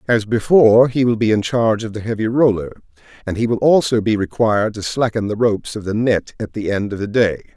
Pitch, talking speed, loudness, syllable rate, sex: 110 Hz, 240 wpm, -17 LUFS, 5.9 syllables/s, male